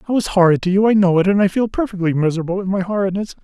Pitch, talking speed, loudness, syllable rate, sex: 190 Hz, 280 wpm, -17 LUFS, 7.4 syllables/s, male